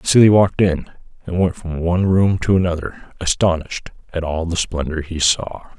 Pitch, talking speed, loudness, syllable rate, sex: 85 Hz, 175 wpm, -18 LUFS, 5.4 syllables/s, male